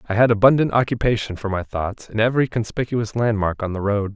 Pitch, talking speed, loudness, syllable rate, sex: 110 Hz, 200 wpm, -20 LUFS, 6.1 syllables/s, male